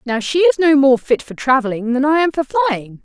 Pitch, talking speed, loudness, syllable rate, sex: 275 Hz, 255 wpm, -15 LUFS, 5.6 syllables/s, female